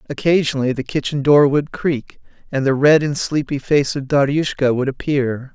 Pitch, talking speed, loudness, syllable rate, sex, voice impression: 140 Hz, 175 wpm, -18 LUFS, 5.0 syllables/s, male, masculine, adult-like, refreshing, slightly sincere, friendly, slightly kind